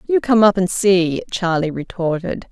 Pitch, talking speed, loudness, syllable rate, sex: 190 Hz, 165 wpm, -17 LUFS, 4.5 syllables/s, female